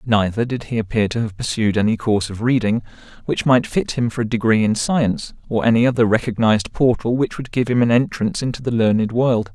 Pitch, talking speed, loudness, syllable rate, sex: 115 Hz, 220 wpm, -19 LUFS, 6.0 syllables/s, male